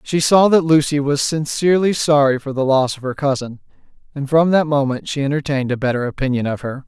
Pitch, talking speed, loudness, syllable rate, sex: 140 Hz, 210 wpm, -17 LUFS, 6.0 syllables/s, male